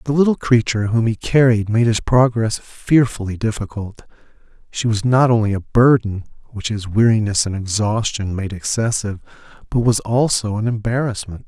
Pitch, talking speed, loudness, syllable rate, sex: 110 Hz, 150 wpm, -18 LUFS, 5.2 syllables/s, male